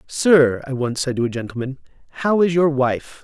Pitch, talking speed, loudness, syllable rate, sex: 140 Hz, 205 wpm, -19 LUFS, 5.0 syllables/s, male